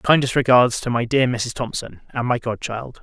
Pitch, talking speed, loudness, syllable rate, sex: 120 Hz, 220 wpm, -20 LUFS, 4.8 syllables/s, male